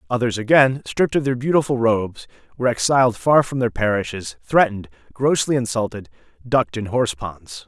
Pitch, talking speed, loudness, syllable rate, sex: 120 Hz, 155 wpm, -19 LUFS, 5.8 syllables/s, male